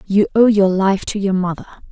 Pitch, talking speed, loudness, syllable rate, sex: 195 Hz, 220 wpm, -16 LUFS, 5.4 syllables/s, female